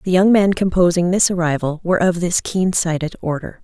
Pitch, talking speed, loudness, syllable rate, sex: 175 Hz, 200 wpm, -17 LUFS, 5.6 syllables/s, female